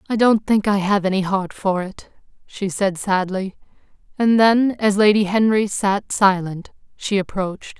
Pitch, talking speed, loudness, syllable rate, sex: 200 Hz, 160 wpm, -18 LUFS, 4.4 syllables/s, female